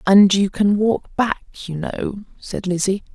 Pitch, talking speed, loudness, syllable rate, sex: 195 Hz, 170 wpm, -19 LUFS, 3.9 syllables/s, female